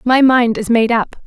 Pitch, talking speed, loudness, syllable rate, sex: 235 Hz, 235 wpm, -13 LUFS, 4.5 syllables/s, female